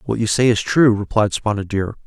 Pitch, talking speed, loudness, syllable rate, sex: 110 Hz, 235 wpm, -18 LUFS, 5.4 syllables/s, male